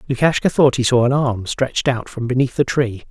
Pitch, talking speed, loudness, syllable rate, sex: 130 Hz, 230 wpm, -18 LUFS, 5.5 syllables/s, male